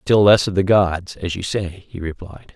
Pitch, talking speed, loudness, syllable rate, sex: 95 Hz, 235 wpm, -18 LUFS, 4.4 syllables/s, male